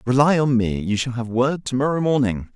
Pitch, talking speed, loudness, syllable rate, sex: 125 Hz, 210 wpm, -20 LUFS, 4.9 syllables/s, male